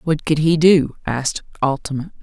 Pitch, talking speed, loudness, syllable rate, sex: 150 Hz, 160 wpm, -18 LUFS, 5.0 syllables/s, female